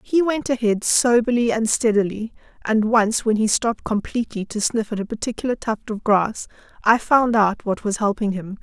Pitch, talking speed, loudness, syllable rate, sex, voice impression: 220 Hz, 190 wpm, -20 LUFS, 5.1 syllables/s, female, feminine, adult-like, tensed, powerful, slightly hard, slightly muffled, raspy, intellectual, calm, friendly, reassuring, unique, slightly lively, slightly kind